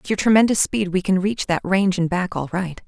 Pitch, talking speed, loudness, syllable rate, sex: 190 Hz, 270 wpm, -20 LUFS, 5.7 syllables/s, female